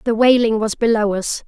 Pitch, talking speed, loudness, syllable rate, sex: 225 Hz, 205 wpm, -16 LUFS, 5.2 syllables/s, female